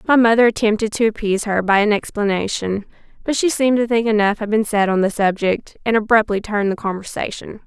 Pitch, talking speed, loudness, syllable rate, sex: 215 Hz, 205 wpm, -18 LUFS, 6.0 syllables/s, female